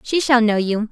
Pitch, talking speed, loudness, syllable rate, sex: 230 Hz, 265 wpm, -17 LUFS, 4.9 syllables/s, female